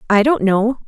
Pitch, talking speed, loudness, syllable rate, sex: 225 Hz, 205 wpm, -15 LUFS, 4.8 syllables/s, female